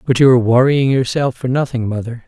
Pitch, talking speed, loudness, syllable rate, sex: 125 Hz, 185 wpm, -15 LUFS, 5.6 syllables/s, male